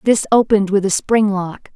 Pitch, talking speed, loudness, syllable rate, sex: 205 Hz, 205 wpm, -15 LUFS, 5.1 syllables/s, female